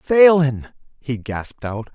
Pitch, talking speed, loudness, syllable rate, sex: 135 Hz, 125 wpm, -18 LUFS, 3.6 syllables/s, male